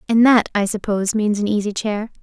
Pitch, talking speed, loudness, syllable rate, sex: 210 Hz, 215 wpm, -18 LUFS, 5.7 syllables/s, female